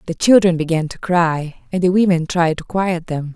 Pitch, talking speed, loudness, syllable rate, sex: 170 Hz, 215 wpm, -17 LUFS, 4.8 syllables/s, female